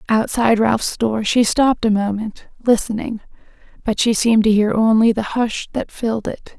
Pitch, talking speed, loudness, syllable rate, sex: 220 Hz, 175 wpm, -17 LUFS, 5.1 syllables/s, female